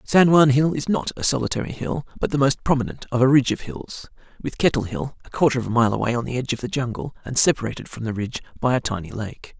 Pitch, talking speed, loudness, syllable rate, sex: 130 Hz, 255 wpm, -22 LUFS, 6.7 syllables/s, male